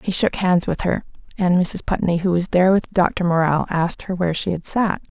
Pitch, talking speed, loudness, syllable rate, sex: 180 Hz, 230 wpm, -20 LUFS, 5.5 syllables/s, female